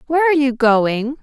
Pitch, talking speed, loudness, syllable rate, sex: 265 Hz, 195 wpm, -15 LUFS, 5.8 syllables/s, female